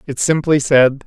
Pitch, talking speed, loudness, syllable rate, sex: 140 Hz, 170 wpm, -14 LUFS, 4.3 syllables/s, male